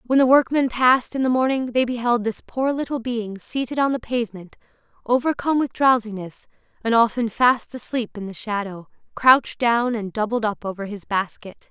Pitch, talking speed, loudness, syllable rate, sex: 235 Hz, 180 wpm, -21 LUFS, 5.3 syllables/s, female